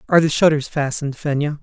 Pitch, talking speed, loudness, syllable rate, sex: 150 Hz, 185 wpm, -19 LUFS, 6.8 syllables/s, male